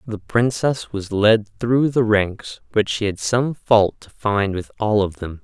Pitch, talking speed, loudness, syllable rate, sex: 110 Hz, 200 wpm, -20 LUFS, 3.8 syllables/s, male